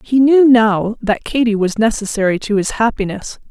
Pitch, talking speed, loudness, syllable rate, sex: 220 Hz, 170 wpm, -15 LUFS, 4.9 syllables/s, female